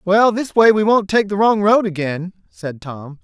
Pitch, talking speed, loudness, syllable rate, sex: 195 Hz, 220 wpm, -15 LUFS, 4.4 syllables/s, male